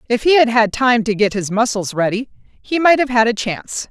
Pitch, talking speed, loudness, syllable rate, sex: 230 Hz, 245 wpm, -16 LUFS, 5.4 syllables/s, female